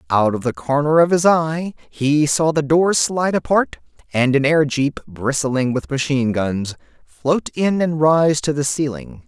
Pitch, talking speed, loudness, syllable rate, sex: 140 Hz, 175 wpm, -18 LUFS, 4.2 syllables/s, male